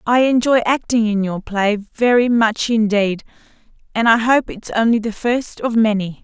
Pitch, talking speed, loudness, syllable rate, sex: 225 Hz, 175 wpm, -17 LUFS, 4.5 syllables/s, female